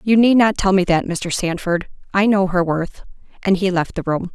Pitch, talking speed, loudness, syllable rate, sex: 185 Hz, 235 wpm, -18 LUFS, 5.0 syllables/s, female